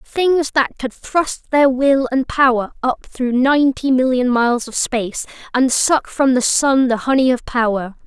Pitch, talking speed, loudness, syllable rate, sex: 260 Hz, 180 wpm, -16 LUFS, 4.2 syllables/s, female